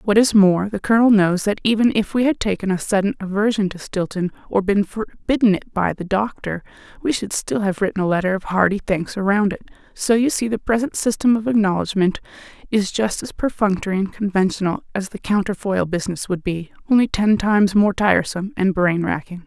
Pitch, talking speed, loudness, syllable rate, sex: 200 Hz, 195 wpm, -19 LUFS, 5.7 syllables/s, female